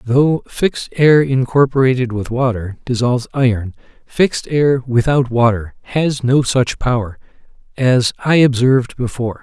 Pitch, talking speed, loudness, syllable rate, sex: 125 Hz, 125 wpm, -15 LUFS, 4.6 syllables/s, male